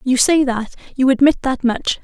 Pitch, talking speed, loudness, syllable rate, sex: 260 Hz, 175 wpm, -16 LUFS, 4.8 syllables/s, female